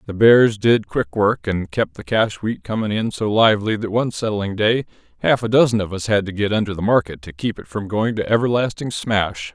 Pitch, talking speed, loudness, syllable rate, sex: 105 Hz, 235 wpm, -19 LUFS, 5.3 syllables/s, male